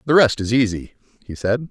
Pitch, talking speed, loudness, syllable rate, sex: 120 Hz, 210 wpm, -19 LUFS, 5.6 syllables/s, male